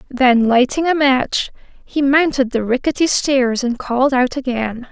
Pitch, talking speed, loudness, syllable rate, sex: 260 Hz, 160 wpm, -16 LUFS, 4.3 syllables/s, female